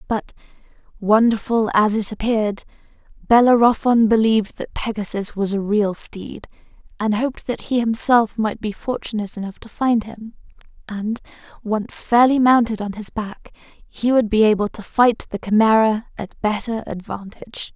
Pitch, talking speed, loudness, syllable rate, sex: 220 Hz, 145 wpm, -19 LUFS, 4.7 syllables/s, female